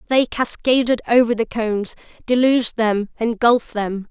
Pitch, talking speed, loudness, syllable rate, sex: 230 Hz, 130 wpm, -18 LUFS, 4.9 syllables/s, female